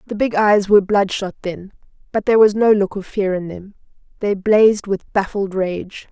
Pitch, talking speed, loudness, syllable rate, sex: 200 Hz, 195 wpm, -17 LUFS, 5.1 syllables/s, female